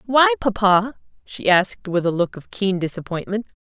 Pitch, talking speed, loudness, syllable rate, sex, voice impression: 205 Hz, 165 wpm, -20 LUFS, 4.9 syllables/s, female, very feminine, very middle-aged, slightly thin, tensed, powerful, slightly dark, soft, clear, fluent, slightly raspy, cool, intellectual, slightly refreshing, sincere, slightly calm, slightly friendly, reassuring, unique, elegant, wild, slightly sweet, lively, strict, intense